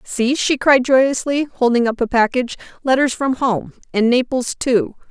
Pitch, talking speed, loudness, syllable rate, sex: 250 Hz, 165 wpm, -17 LUFS, 4.6 syllables/s, female